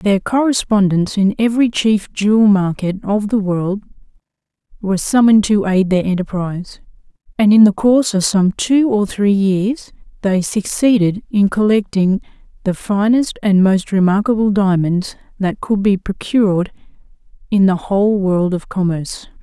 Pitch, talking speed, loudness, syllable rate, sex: 200 Hz, 140 wpm, -15 LUFS, 4.7 syllables/s, female